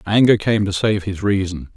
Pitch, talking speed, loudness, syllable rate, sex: 100 Hz, 205 wpm, -18 LUFS, 4.9 syllables/s, male